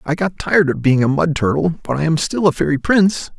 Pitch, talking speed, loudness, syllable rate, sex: 155 Hz, 265 wpm, -16 LUFS, 5.9 syllables/s, male